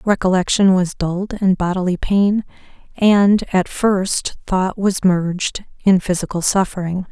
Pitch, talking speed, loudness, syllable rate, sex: 190 Hz, 125 wpm, -17 LUFS, 4.2 syllables/s, female